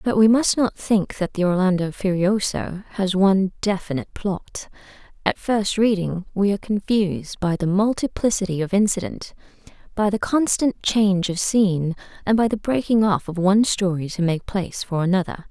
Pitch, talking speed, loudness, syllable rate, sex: 195 Hz, 165 wpm, -21 LUFS, 5.1 syllables/s, female